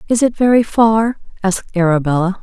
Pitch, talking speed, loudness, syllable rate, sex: 205 Hz, 150 wpm, -15 LUFS, 5.7 syllables/s, female